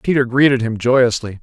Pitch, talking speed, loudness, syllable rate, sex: 125 Hz, 170 wpm, -15 LUFS, 5.0 syllables/s, male